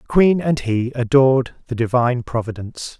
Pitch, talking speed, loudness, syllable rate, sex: 125 Hz, 160 wpm, -18 LUFS, 5.1 syllables/s, male